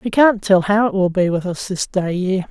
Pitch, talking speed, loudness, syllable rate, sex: 195 Hz, 290 wpm, -17 LUFS, 4.9 syllables/s, female